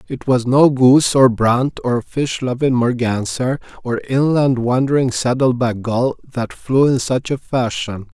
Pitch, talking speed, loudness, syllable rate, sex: 125 Hz, 155 wpm, -17 LUFS, 4.1 syllables/s, male